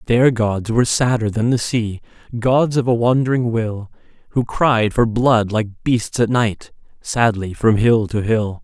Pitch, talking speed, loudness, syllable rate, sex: 115 Hz, 175 wpm, -17 LUFS, 4.1 syllables/s, male